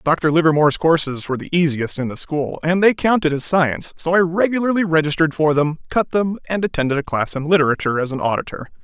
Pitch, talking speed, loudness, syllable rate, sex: 160 Hz, 210 wpm, -18 LUFS, 6.3 syllables/s, male